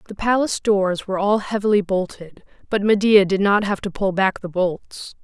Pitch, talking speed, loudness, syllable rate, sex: 200 Hz, 195 wpm, -19 LUFS, 5.1 syllables/s, female